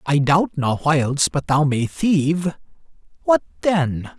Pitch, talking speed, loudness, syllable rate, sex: 155 Hz, 145 wpm, -19 LUFS, 3.8 syllables/s, male